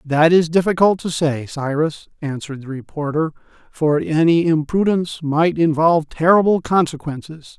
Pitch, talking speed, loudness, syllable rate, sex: 160 Hz, 125 wpm, -18 LUFS, 4.9 syllables/s, male